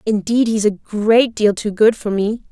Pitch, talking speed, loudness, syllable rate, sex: 215 Hz, 215 wpm, -16 LUFS, 4.3 syllables/s, female